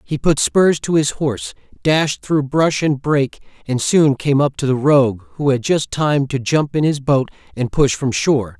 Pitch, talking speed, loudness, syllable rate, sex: 140 Hz, 215 wpm, -17 LUFS, 4.6 syllables/s, male